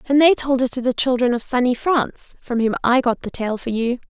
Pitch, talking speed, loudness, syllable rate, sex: 250 Hz, 265 wpm, -19 LUFS, 5.6 syllables/s, female